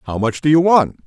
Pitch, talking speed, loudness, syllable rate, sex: 140 Hz, 280 wpm, -15 LUFS, 5.5 syllables/s, male